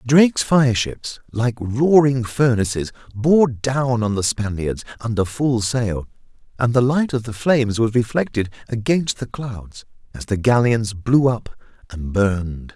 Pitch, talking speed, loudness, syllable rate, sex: 120 Hz, 150 wpm, -19 LUFS, 4.1 syllables/s, male